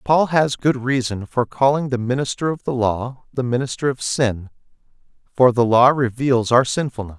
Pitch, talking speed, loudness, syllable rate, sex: 125 Hz, 175 wpm, -19 LUFS, 4.8 syllables/s, male